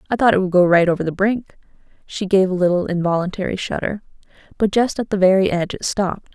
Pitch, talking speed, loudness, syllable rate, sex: 190 Hz, 200 wpm, -18 LUFS, 6.6 syllables/s, female